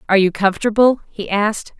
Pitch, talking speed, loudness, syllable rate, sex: 205 Hz, 165 wpm, -17 LUFS, 6.7 syllables/s, female